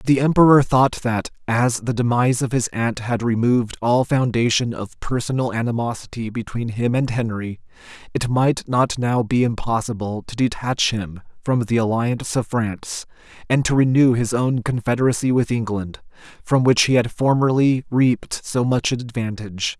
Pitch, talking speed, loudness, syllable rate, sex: 120 Hz, 160 wpm, -20 LUFS, 4.9 syllables/s, male